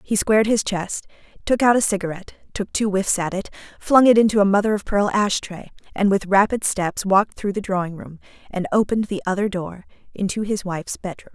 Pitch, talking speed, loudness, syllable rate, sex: 200 Hz, 205 wpm, -20 LUFS, 5.9 syllables/s, female